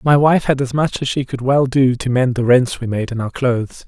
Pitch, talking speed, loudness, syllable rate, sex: 130 Hz, 295 wpm, -17 LUFS, 5.3 syllables/s, male